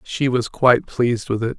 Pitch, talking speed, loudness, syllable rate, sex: 125 Hz, 225 wpm, -19 LUFS, 5.4 syllables/s, male